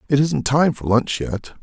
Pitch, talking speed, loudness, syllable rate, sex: 130 Hz, 220 wpm, -19 LUFS, 4.4 syllables/s, male